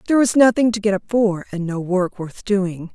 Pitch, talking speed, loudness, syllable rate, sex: 200 Hz, 245 wpm, -19 LUFS, 5.3 syllables/s, female